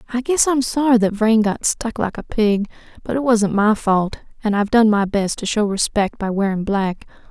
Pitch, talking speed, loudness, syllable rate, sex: 215 Hz, 220 wpm, -18 LUFS, 5.0 syllables/s, female